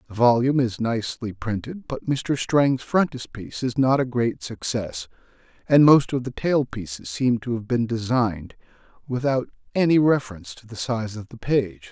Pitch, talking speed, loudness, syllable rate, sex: 120 Hz, 170 wpm, -23 LUFS, 4.9 syllables/s, male